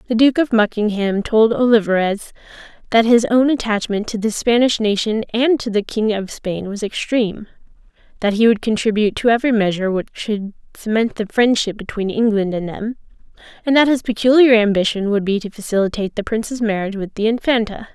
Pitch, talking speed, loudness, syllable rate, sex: 220 Hz, 175 wpm, -17 LUFS, 5.8 syllables/s, female